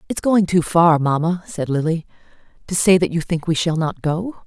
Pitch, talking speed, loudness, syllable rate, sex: 165 Hz, 215 wpm, -18 LUFS, 4.8 syllables/s, female